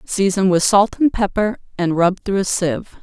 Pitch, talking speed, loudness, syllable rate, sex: 190 Hz, 200 wpm, -17 LUFS, 4.8 syllables/s, female